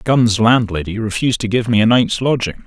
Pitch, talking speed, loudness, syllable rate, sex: 110 Hz, 200 wpm, -15 LUFS, 5.6 syllables/s, male